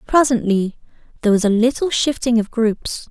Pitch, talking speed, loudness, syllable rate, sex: 235 Hz, 155 wpm, -18 LUFS, 5.2 syllables/s, female